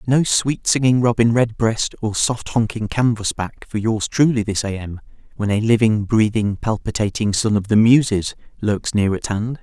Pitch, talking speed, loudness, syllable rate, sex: 110 Hz, 175 wpm, -19 LUFS, 4.6 syllables/s, male